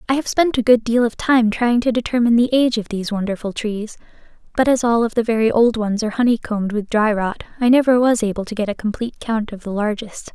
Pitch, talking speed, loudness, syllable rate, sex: 225 Hz, 250 wpm, -18 LUFS, 6.3 syllables/s, female